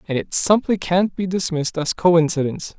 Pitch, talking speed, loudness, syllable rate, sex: 175 Hz, 170 wpm, -19 LUFS, 5.3 syllables/s, male